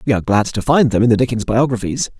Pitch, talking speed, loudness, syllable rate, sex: 120 Hz, 275 wpm, -16 LUFS, 6.9 syllables/s, male